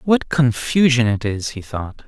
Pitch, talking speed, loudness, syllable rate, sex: 125 Hz, 175 wpm, -18 LUFS, 4.0 syllables/s, male